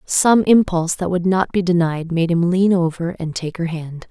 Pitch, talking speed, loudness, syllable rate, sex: 175 Hz, 220 wpm, -18 LUFS, 4.7 syllables/s, female